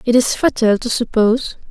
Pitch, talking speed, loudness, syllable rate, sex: 235 Hz, 175 wpm, -16 LUFS, 5.4 syllables/s, female